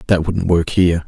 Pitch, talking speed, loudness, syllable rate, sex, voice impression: 85 Hz, 225 wpm, -16 LUFS, 5.6 syllables/s, male, very masculine, very adult-like, muffled, cool, intellectual, mature, elegant, slightly sweet